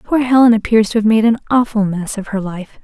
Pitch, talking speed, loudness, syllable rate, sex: 220 Hz, 255 wpm, -14 LUFS, 5.8 syllables/s, female